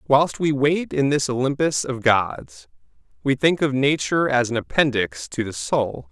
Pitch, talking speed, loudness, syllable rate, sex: 130 Hz, 175 wpm, -21 LUFS, 4.4 syllables/s, male